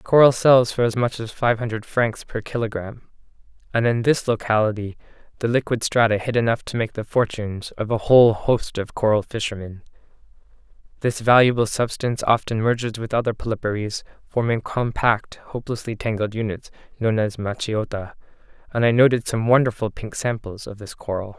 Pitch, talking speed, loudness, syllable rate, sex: 115 Hz, 160 wpm, -21 LUFS, 5.4 syllables/s, male